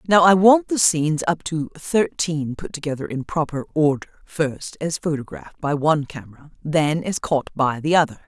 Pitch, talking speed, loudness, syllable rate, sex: 155 Hz, 180 wpm, -21 LUFS, 5.0 syllables/s, female